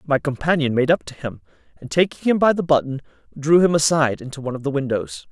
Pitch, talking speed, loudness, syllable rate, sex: 145 Hz, 225 wpm, -20 LUFS, 6.4 syllables/s, male